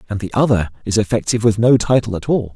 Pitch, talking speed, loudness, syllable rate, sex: 110 Hz, 235 wpm, -17 LUFS, 6.8 syllables/s, male